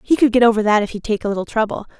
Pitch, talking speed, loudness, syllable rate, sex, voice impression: 220 Hz, 330 wpm, -17 LUFS, 7.9 syllables/s, female, feminine, adult-like, tensed, powerful, slightly hard, slightly soft, fluent, intellectual, lively, sharp